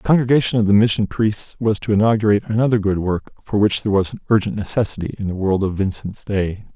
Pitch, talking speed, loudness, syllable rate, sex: 105 Hz, 220 wpm, -19 LUFS, 6.3 syllables/s, male